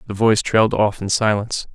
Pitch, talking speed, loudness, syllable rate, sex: 105 Hz, 205 wpm, -18 LUFS, 6.5 syllables/s, male